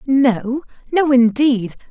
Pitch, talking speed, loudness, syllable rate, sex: 255 Hz, 95 wpm, -16 LUFS, 2.9 syllables/s, female